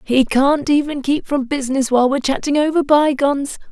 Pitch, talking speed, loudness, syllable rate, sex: 275 Hz, 180 wpm, -17 LUFS, 5.7 syllables/s, female